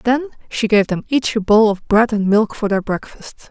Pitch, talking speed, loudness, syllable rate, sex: 220 Hz, 240 wpm, -17 LUFS, 4.6 syllables/s, female